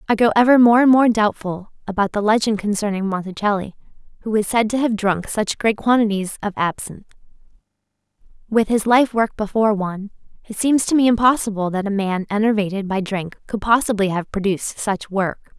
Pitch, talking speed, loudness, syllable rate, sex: 210 Hz, 175 wpm, -19 LUFS, 5.6 syllables/s, female